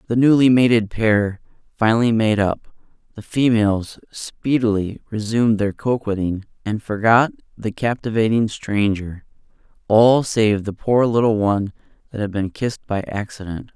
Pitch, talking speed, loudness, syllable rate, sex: 110 Hz, 125 wpm, -19 LUFS, 4.7 syllables/s, male